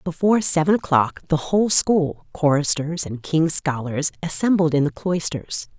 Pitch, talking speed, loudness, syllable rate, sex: 160 Hz, 145 wpm, -20 LUFS, 4.6 syllables/s, female